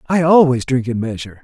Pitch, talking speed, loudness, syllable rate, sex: 135 Hz, 210 wpm, -15 LUFS, 6.1 syllables/s, male